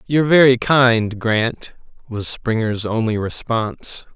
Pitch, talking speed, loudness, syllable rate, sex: 115 Hz, 115 wpm, -17 LUFS, 3.9 syllables/s, male